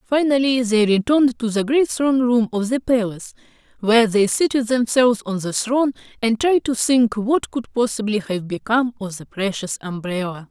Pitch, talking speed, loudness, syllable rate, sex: 230 Hz, 175 wpm, -19 LUFS, 5.3 syllables/s, female